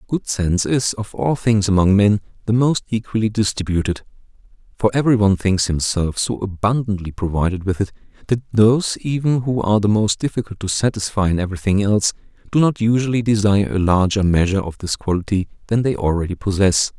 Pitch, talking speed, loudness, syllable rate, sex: 105 Hz, 175 wpm, -18 LUFS, 6.0 syllables/s, male